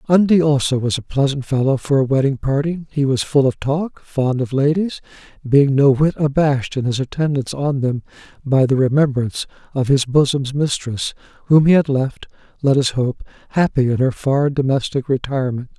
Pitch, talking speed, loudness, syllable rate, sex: 140 Hz, 180 wpm, -18 LUFS, 5.2 syllables/s, male